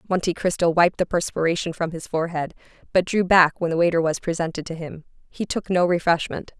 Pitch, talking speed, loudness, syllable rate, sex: 170 Hz, 200 wpm, -22 LUFS, 5.9 syllables/s, female